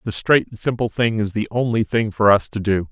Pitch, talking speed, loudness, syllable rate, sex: 105 Hz, 270 wpm, -19 LUFS, 5.5 syllables/s, male